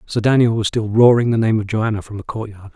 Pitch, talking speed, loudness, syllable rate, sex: 110 Hz, 260 wpm, -17 LUFS, 6.1 syllables/s, male